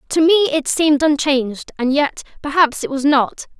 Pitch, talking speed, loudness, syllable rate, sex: 290 Hz, 150 wpm, -16 LUFS, 5.2 syllables/s, female